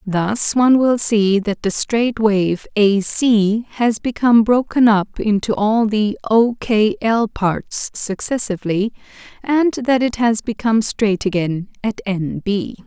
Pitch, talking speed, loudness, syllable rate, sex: 220 Hz, 150 wpm, -17 LUFS, 3.8 syllables/s, female